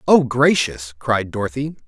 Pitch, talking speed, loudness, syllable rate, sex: 125 Hz, 130 wpm, -19 LUFS, 4.3 syllables/s, male